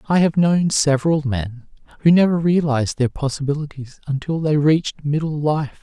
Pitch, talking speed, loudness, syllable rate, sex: 150 Hz, 155 wpm, -19 LUFS, 5.1 syllables/s, male